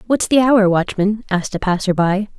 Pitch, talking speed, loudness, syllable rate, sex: 200 Hz, 200 wpm, -16 LUFS, 5.2 syllables/s, female